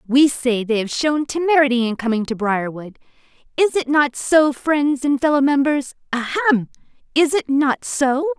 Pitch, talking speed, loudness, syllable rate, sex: 270 Hz, 150 wpm, -18 LUFS, 4.5 syllables/s, female